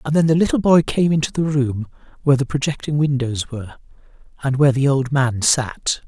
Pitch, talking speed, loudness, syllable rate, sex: 140 Hz, 195 wpm, -18 LUFS, 5.7 syllables/s, male